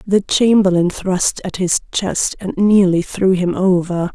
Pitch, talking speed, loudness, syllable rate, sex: 185 Hz, 160 wpm, -16 LUFS, 3.9 syllables/s, female